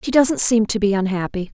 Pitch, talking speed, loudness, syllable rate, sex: 215 Hz, 225 wpm, -18 LUFS, 5.5 syllables/s, female